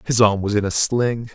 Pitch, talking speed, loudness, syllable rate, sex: 110 Hz, 270 wpm, -19 LUFS, 4.9 syllables/s, male